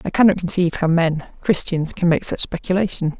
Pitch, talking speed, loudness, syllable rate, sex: 175 Hz, 190 wpm, -19 LUFS, 5.8 syllables/s, female